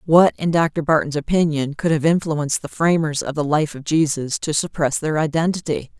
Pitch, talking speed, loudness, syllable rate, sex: 155 Hz, 190 wpm, -19 LUFS, 5.2 syllables/s, female